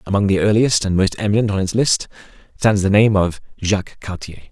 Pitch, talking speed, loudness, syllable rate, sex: 100 Hz, 200 wpm, -17 LUFS, 5.8 syllables/s, male